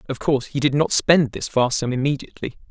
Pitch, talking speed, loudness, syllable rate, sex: 135 Hz, 220 wpm, -20 LUFS, 6.2 syllables/s, male